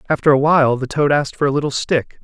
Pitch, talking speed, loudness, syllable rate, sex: 140 Hz, 270 wpm, -16 LUFS, 7.0 syllables/s, male